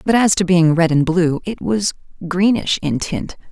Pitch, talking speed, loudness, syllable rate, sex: 180 Hz, 190 wpm, -17 LUFS, 4.4 syllables/s, female